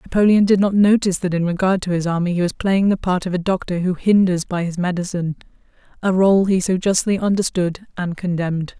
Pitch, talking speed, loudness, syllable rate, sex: 185 Hz, 205 wpm, -18 LUFS, 6.1 syllables/s, female